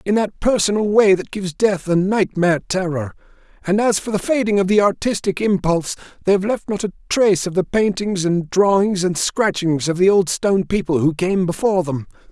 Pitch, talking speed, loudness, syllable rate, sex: 190 Hz, 195 wpm, -18 LUFS, 5.5 syllables/s, male